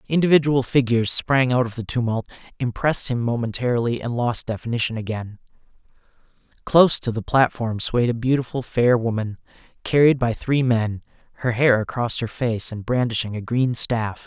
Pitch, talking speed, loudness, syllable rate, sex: 120 Hz, 155 wpm, -21 LUFS, 5.3 syllables/s, male